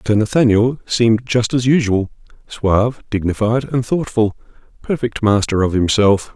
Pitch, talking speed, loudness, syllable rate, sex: 115 Hz, 115 wpm, -16 LUFS, 5.0 syllables/s, male